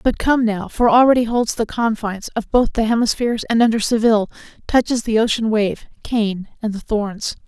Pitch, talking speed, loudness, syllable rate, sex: 225 Hz, 185 wpm, -18 LUFS, 5.3 syllables/s, female